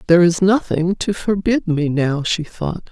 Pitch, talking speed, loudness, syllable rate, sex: 175 Hz, 185 wpm, -18 LUFS, 4.5 syllables/s, female